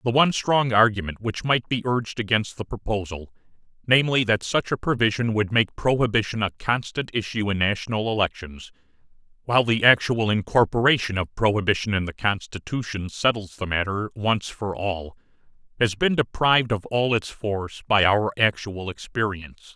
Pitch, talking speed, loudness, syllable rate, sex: 110 Hz, 150 wpm, -23 LUFS, 5.2 syllables/s, male